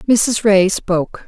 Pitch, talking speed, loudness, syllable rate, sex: 205 Hz, 140 wpm, -15 LUFS, 3.6 syllables/s, female